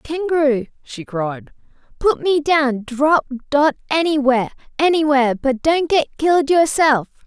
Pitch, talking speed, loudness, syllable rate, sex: 275 Hz, 125 wpm, -17 LUFS, 4.4 syllables/s, male